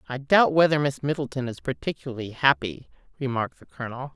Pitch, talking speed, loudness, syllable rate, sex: 135 Hz, 160 wpm, -24 LUFS, 6.3 syllables/s, female